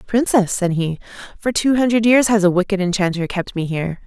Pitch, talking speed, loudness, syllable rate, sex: 200 Hz, 205 wpm, -18 LUFS, 5.7 syllables/s, female